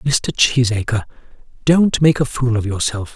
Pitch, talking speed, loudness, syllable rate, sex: 120 Hz, 150 wpm, -17 LUFS, 4.4 syllables/s, male